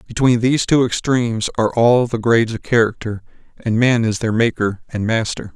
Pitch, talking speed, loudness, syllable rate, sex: 115 Hz, 185 wpm, -17 LUFS, 5.5 syllables/s, male